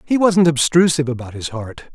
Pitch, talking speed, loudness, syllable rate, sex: 150 Hz, 185 wpm, -16 LUFS, 5.8 syllables/s, male